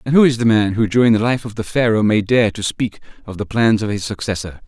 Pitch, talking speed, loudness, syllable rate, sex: 110 Hz, 280 wpm, -17 LUFS, 6.1 syllables/s, male